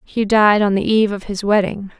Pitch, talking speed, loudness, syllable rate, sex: 205 Hz, 240 wpm, -16 LUFS, 5.4 syllables/s, female